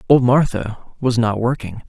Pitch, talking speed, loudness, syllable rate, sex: 120 Hz, 160 wpm, -18 LUFS, 4.7 syllables/s, male